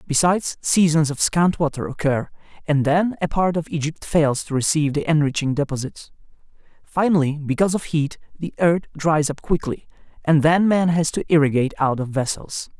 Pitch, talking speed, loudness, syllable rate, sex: 155 Hz, 170 wpm, -20 LUFS, 5.4 syllables/s, male